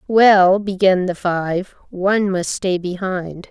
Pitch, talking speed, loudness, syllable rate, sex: 185 Hz, 135 wpm, -17 LUFS, 3.5 syllables/s, female